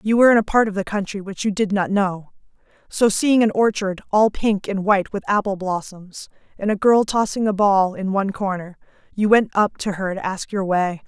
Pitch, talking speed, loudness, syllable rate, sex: 200 Hz, 225 wpm, -20 LUFS, 5.3 syllables/s, female